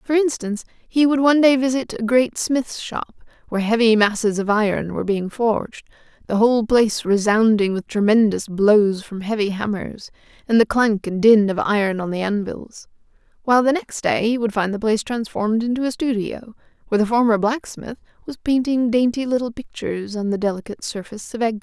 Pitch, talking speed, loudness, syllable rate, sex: 225 Hz, 190 wpm, -19 LUFS, 5.6 syllables/s, female